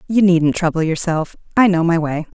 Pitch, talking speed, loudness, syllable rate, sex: 170 Hz, 200 wpm, -17 LUFS, 5.2 syllables/s, female